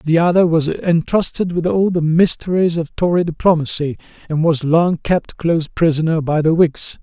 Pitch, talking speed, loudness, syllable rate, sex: 165 Hz, 170 wpm, -16 LUFS, 4.8 syllables/s, male